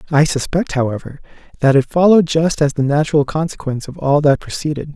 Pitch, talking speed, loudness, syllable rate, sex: 150 Hz, 180 wpm, -16 LUFS, 6.2 syllables/s, male